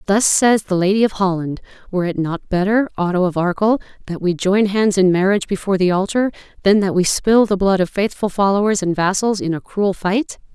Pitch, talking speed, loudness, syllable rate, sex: 195 Hz, 210 wpm, -17 LUFS, 5.6 syllables/s, female